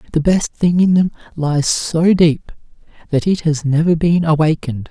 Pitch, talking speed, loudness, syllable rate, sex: 160 Hz, 170 wpm, -15 LUFS, 4.7 syllables/s, male